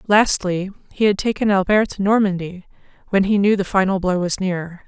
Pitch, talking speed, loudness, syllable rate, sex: 195 Hz, 185 wpm, -19 LUFS, 5.2 syllables/s, female